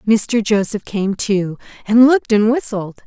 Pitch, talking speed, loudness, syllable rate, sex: 215 Hz, 155 wpm, -16 LUFS, 4.2 syllables/s, female